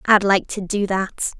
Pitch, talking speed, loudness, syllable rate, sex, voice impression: 195 Hz, 215 wpm, -20 LUFS, 4.3 syllables/s, female, slightly feminine, young, slightly tensed, slightly bright, cute, refreshing, slightly lively